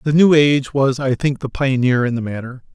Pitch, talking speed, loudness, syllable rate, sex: 135 Hz, 240 wpm, -16 LUFS, 5.5 syllables/s, male